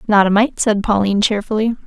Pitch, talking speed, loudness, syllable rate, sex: 210 Hz, 195 wpm, -16 LUFS, 6.1 syllables/s, female